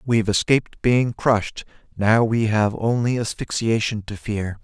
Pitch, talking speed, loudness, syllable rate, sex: 110 Hz, 140 wpm, -21 LUFS, 4.5 syllables/s, male